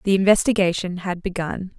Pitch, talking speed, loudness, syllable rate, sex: 185 Hz, 135 wpm, -21 LUFS, 5.4 syllables/s, female